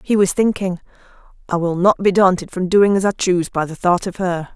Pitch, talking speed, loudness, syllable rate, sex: 185 Hz, 235 wpm, -17 LUFS, 5.6 syllables/s, female